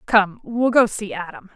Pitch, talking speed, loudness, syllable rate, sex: 215 Hz, 195 wpm, -20 LUFS, 4.4 syllables/s, female